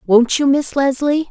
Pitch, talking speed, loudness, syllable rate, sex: 270 Hz, 185 wpm, -15 LUFS, 4.2 syllables/s, female